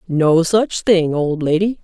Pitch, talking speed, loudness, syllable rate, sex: 175 Hz, 165 wpm, -16 LUFS, 3.6 syllables/s, female